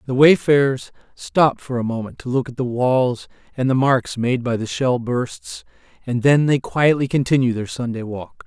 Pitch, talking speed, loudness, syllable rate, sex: 125 Hz, 190 wpm, -19 LUFS, 4.6 syllables/s, male